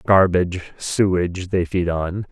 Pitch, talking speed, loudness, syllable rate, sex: 90 Hz, 130 wpm, -20 LUFS, 4.3 syllables/s, male